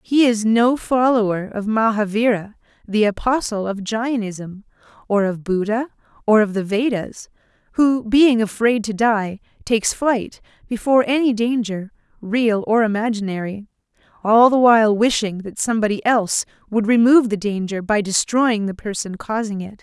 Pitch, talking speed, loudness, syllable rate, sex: 220 Hz, 140 wpm, -18 LUFS, 4.7 syllables/s, female